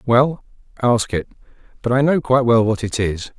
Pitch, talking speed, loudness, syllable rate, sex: 120 Hz, 195 wpm, -18 LUFS, 5.1 syllables/s, male